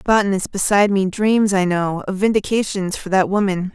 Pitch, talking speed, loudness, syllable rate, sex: 195 Hz, 190 wpm, -18 LUFS, 5.6 syllables/s, female